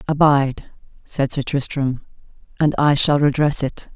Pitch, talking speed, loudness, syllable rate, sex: 140 Hz, 135 wpm, -19 LUFS, 4.6 syllables/s, female